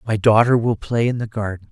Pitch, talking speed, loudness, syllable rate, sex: 110 Hz, 245 wpm, -18 LUFS, 5.7 syllables/s, male